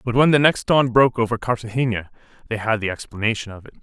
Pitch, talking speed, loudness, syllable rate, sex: 115 Hz, 220 wpm, -20 LUFS, 6.8 syllables/s, male